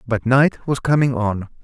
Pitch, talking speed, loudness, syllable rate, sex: 125 Hz, 185 wpm, -18 LUFS, 4.4 syllables/s, male